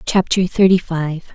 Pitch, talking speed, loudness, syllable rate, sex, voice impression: 175 Hz, 135 wpm, -16 LUFS, 4.2 syllables/s, female, feminine, adult-like, weak, very calm, slightly elegant, modest